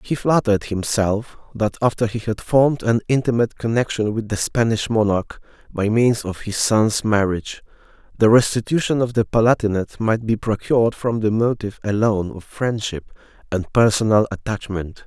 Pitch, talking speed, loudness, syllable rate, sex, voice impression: 110 Hz, 150 wpm, -19 LUFS, 5.3 syllables/s, male, masculine, adult-like, tensed, slightly powerful, slightly muffled, cool, intellectual, sincere, calm, friendly, reassuring, slightly lively, slightly kind, slightly modest